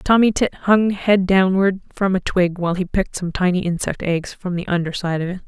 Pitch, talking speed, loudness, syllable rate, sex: 185 Hz, 230 wpm, -19 LUFS, 5.3 syllables/s, female